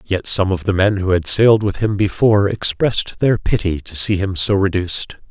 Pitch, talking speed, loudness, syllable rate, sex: 95 Hz, 215 wpm, -16 LUFS, 5.3 syllables/s, male